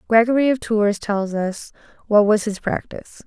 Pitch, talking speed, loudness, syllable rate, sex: 215 Hz, 165 wpm, -19 LUFS, 4.8 syllables/s, female